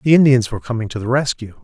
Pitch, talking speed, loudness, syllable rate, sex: 120 Hz, 260 wpm, -17 LUFS, 7.3 syllables/s, male